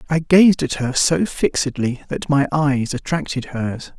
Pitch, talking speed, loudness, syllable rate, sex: 145 Hz, 165 wpm, -18 LUFS, 4.1 syllables/s, male